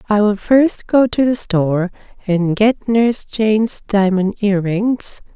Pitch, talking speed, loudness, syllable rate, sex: 210 Hz, 145 wpm, -16 LUFS, 3.9 syllables/s, female